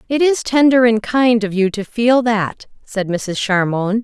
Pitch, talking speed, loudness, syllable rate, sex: 225 Hz, 195 wpm, -16 LUFS, 4.0 syllables/s, female